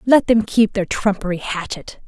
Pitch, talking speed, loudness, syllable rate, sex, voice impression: 205 Hz, 175 wpm, -18 LUFS, 4.7 syllables/s, female, very feminine, slightly adult-like, very thin, slightly tensed, slightly weak, very bright, soft, very clear, very fluent, very cute, intellectual, very refreshing, sincere, calm, very friendly, very reassuring, very unique, very elegant, very sweet, lively, kind, sharp, light